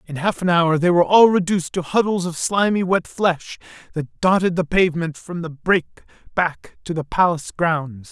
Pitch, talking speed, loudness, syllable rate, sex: 175 Hz, 190 wpm, -19 LUFS, 5.0 syllables/s, male